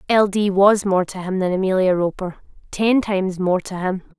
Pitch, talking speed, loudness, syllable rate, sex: 190 Hz, 185 wpm, -19 LUFS, 4.9 syllables/s, female